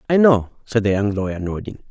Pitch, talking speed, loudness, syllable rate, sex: 110 Hz, 220 wpm, -19 LUFS, 5.9 syllables/s, male